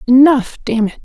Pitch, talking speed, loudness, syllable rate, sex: 255 Hz, 175 wpm, -13 LUFS, 4.9 syllables/s, female